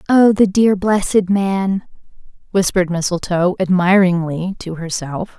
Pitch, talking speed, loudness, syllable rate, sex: 185 Hz, 110 wpm, -16 LUFS, 4.2 syllables/s, female